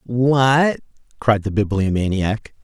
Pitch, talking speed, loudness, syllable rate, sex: 115 Hz, 90 wpm, -18 LUFS, 3.4 syllables/s, male